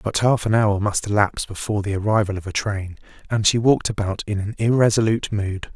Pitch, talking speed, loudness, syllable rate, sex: 105 Hz, 210 wpm, -21 LUFS, 6.1 syllables/s, male